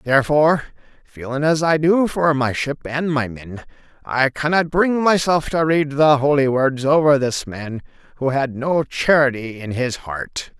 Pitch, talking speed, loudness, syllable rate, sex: 140 Hz, 170 wpm, -18 LUFS, 4.4 syllables/s, male